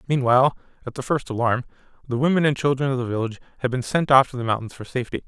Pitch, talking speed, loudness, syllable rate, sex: 130 Hz, 240 wpm, -22 LUFS, 7.5 syllables/s, male